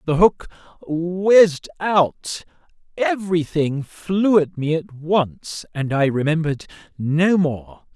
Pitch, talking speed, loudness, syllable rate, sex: 160 Hz, 115 wpm, -20 LUFS, 3.5 syllables/s, male